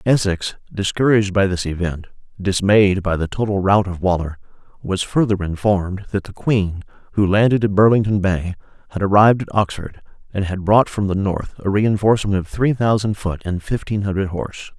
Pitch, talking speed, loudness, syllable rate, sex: 100 Hz, 175 wpm, -18 LUFS, 5.3 syllables/s, male